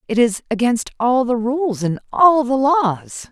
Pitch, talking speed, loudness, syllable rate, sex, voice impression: 240 Hz, 180 wpm, -17 LUFS, 3.8 syllables/s, female, very feminine, very adult-like, slightly thin, tensed, slightly powerful, bright, slightly hard, clear, fluent, slightly raspy, slightly cute, very intellectual, refreshing, very sincere, calm, friendly, reassuring, slightly unique, elegant, slightly wild, sweet, slightly lively, kind, modest, light